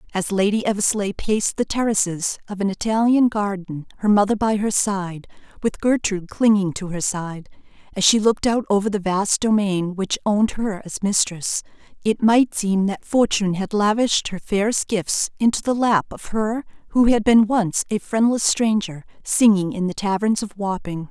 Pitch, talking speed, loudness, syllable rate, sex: 205 Hz, 175 wpm, -20 LUFS, 4.9 syllables/s, female